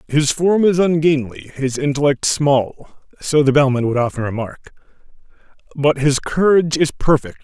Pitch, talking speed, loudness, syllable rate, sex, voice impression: 145 Hz, 135 wpm, -17 LUFS, 3.8 syllables/s, male, masculine, very middle-aged, slightly thick, tensed, slightly powerful, bright, slightly hard, clear, slightly halting, cool, slightly intellectual, very refreshing, sincere, calm, mature, friendly, reassuring, very unique, slightly elegant, wild, slightly sweet, very lively, kind, intense